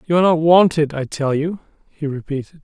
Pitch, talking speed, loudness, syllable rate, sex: 155 Hz, 205 wpm, -18 LUFS, 6.1 syllables/s, male